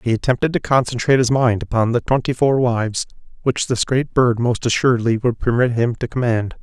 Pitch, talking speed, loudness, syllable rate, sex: 120 Hz, 200 wpm, -18 LUFS, 5.7 syllables/s, male